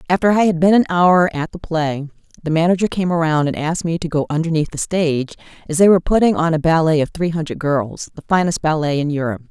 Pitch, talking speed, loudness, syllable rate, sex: 165 Hz, 235 wpm, -17 LUFS, 6.4 syllables/s, female